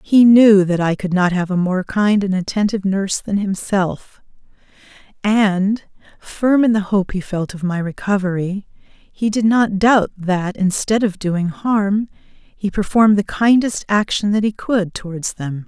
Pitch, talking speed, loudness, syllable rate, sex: 200 Hz, 170 wpm, -17 LUFS, 4.2 syllables/s, female